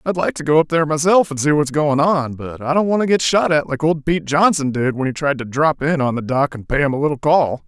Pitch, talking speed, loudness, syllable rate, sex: 150 Hz, 315 wpm, -17 LUFS, 6.0 syllables/s, male